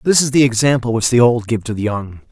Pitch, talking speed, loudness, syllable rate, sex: 120 Hz, 285 wpm, -15 LUFS, 6.1 syllables/s, male